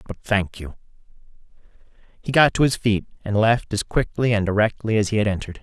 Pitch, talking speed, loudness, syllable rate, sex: 105 Hz, 190 wpm, -21 LUFS, 6.0 syllables/s, male